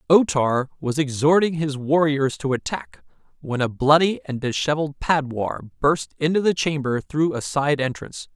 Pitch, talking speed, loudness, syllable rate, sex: 145 Hz, 160 wpm, -21 LUFS, 4.7 syllables/s, male